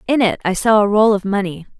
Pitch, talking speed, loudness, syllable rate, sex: 205 Hz, 265 wpm, -15 LUFS, 6.1 syllables/s, female